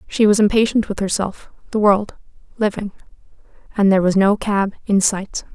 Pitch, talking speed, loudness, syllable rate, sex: 200 Hz, 150 wpm, -18 LUFS, 5.3 syllables/s, female